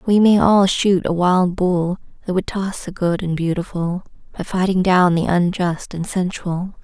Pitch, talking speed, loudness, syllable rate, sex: 180 Hz, 185 wpm, -18 LUFS, 4.3 syllables/s, female